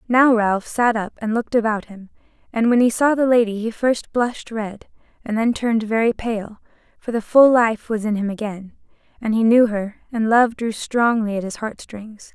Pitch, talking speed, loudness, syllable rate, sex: 225 Hz, 210 wpm, -19 LUFS, 4.9 syllables/s, female